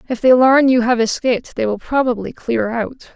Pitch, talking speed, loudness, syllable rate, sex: 245 Hz, 210 wpm, -16 LUFS, 5.0 syllables/s, female